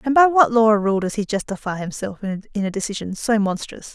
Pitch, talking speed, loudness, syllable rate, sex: 210 Hz, 230 wpm, -20 LUFS, 5.7 syllables/s, female